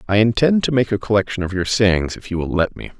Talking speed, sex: 280 wpm, male